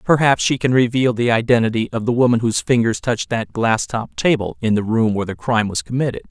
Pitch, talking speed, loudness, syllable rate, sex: 115 Hz, 230 wpm, -18 LUFS, 6.4 syllables/s, male